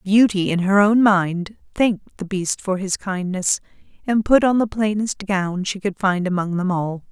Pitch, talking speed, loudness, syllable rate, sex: 195 Hz, 195 wpm, -20 LUFS, 4.4 syllables/s, female